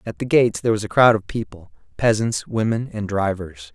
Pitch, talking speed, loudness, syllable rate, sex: 105 Hz, 210 wpm, -20 LUFS, 5.6 syllables/s, male